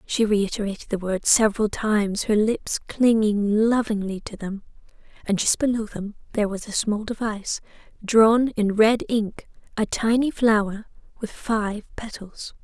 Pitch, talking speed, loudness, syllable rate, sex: 215 Hz, 140 wpm, -22 LUFS, 4.5 syllables/s, female